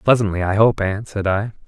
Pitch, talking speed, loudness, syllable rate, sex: 105 Hz, 215 wpm, -19 LUFS, 5.5 syllables/s, male